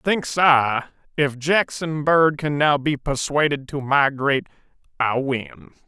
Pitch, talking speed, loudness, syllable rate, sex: 145 Hz, 135 wpm, -20 LUFS, 3.9 syllables/s, male